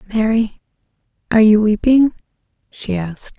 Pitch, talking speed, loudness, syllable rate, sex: 220 Hz, 105 wpm, -16 LUFS, 5.6 syllables/s, female